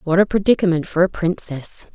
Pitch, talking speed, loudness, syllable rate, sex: 175 Hz, 185 wpm, -18 LUFS, 5.6 syllables/s, female